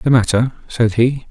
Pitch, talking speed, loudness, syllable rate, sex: 120 Hz, 185 wpm, -16 LUFS, 4.5 syllables/s, male